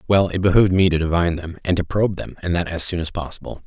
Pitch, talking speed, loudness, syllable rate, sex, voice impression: 90 Hz, 280 wpm, -20 LUFS, 7.2 syllables/s, male, very masculine, very adult-like, slightly old, very thick, tensed, very powerful, slightly dark, hard, muffled, slightly fluent, slightly raspy, very cool, intellectual, very sincere, very calm, very mature, friendly, reassuring, very unique, elegant, very wild, sweet, kind, modest